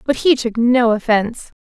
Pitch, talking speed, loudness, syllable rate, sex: 235 Hz, 185 wpm, -16 LUFS, 4.8 syllables/s, female